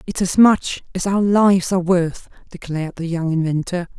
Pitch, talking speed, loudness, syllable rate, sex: 180 Hz, 180 wpm, -18 LUFS, 5.2 syllables/s, female